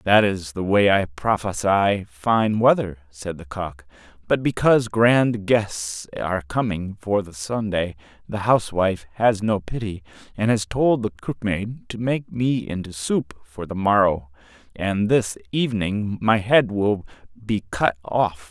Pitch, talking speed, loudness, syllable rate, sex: 100 Hz, 155 wpm, -22 LUFS, 4.2 syllables/s, male